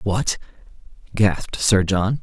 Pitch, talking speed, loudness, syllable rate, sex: 105 Hz, 110 wpm, -20 LUFS, 3.7 syllables/s, male